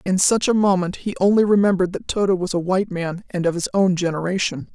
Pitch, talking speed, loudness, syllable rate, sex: 185 Hz, 230 wpm, -20 LUFS, 6.0 syllables/s, female